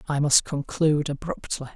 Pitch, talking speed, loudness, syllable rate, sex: 150 Hz, 135 wpm, -24 LUFS, 5.1 syllables/s, male